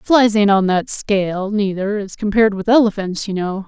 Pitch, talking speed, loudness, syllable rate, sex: 205 Hz, 195 wpm, -17 LUFS, 5.0 syllables/s, female